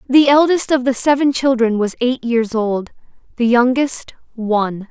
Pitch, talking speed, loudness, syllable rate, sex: 245 Hz, 160 wpm, -16 LUFS, 4.5 syllables/s, female